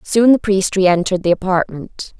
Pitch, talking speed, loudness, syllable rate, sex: 190 Hz, 165 wpm, -15 LUFS, 5.4 syllables/s, female